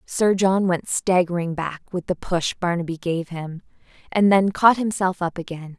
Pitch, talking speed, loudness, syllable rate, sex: 180 Hz, 175 wpm, -21 LUFS, 4.5 syllables/s, female